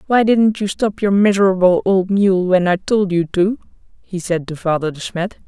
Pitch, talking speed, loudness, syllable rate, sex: 190 Hz, 210 wpm, -16 LUFS, 4.8 syllables/s, female